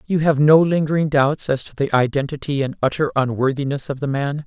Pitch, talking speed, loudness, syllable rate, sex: 145 Hz, 200 wpm, -19 LUFS, 5.6 syllables/s, female